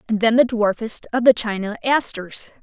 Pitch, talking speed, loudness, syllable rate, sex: 225 Hz, 185 wpm, -19 LUFS, 4.9 syllables/s, female